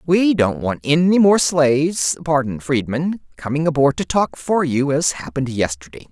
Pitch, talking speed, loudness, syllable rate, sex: 145 Hz, 165 wpm, -18 LUFS, 4.7 syllables/s, male